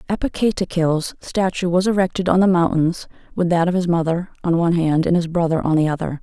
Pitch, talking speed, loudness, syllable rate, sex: 175 Hz, 200 wpm, -19 LUFS, 5.9 syllables/s, female